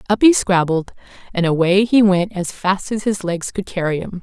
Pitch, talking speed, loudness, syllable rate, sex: 190 Hz, 215 wpm, -17 LUFS, 5.0 syllables/s, female